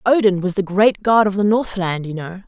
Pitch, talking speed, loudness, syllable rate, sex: 195 Hz, 245 wpm, -17 LUFS, 5.1 syllables/s, female